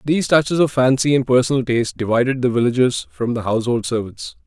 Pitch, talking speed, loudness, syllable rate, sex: 125 Hz, 190 wpm, -18 LUFS, 6.4 syllables/s, male